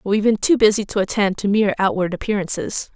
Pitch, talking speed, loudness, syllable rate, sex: 205 Hz, 205 wpm, -19 LUFS, 6.5 syllables/s, female